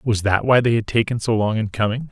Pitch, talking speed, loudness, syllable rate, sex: 115 Hz, 285 wpm, -19 LUFS, 5.8 syllables/s, male